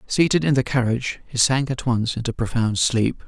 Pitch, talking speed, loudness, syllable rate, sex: 125 Hz, 200 wpm, -21 LUFS, 5.2 syllables/s, male